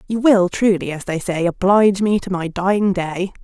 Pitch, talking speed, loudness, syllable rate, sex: 190 Hz, 210 wpm, -17 LUFS, 5.1 syllables/s, female